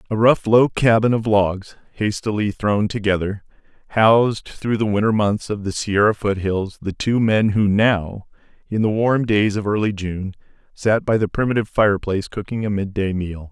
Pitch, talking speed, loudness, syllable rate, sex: 105 Hz, 175 wpm, -19 LUFS, 4.8 syllables/s, male